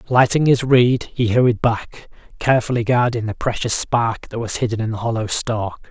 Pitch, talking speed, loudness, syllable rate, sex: 115 Hz, 185 wpm, -18 LUFS, 5.0 syllables/s, male